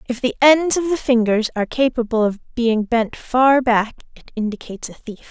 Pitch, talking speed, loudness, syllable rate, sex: 240 Hz, 190 wpm, -18 LUFS, 5.1 syllables/s, female